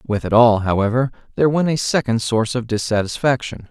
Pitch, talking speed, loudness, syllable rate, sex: 120 Hz, 180 wpm, -18 LUFS, 5.9 syllables/s, male